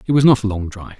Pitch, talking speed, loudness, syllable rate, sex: 110 Hz, 360 wpm, -16 LUFS, 8.1 syllables/s, male